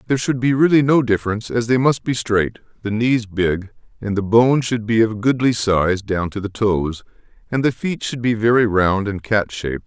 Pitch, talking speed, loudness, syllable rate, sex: 110 Hz, 220 wpm, -18 LUFS, 5.1 syllables/s, male